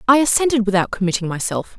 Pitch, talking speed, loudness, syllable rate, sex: 215 Hz, 170 wpm, -18 LUFS, 6.8 syllables/s, female